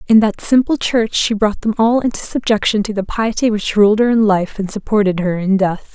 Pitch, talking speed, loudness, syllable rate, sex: 215 Hz, 230 wpm, -15 LUFS, 5.2 syllables/s, female